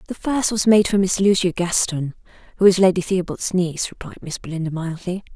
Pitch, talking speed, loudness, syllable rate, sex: 185 Hz, 190 wpm, -20 LUFS, 5.6 syllables/s, female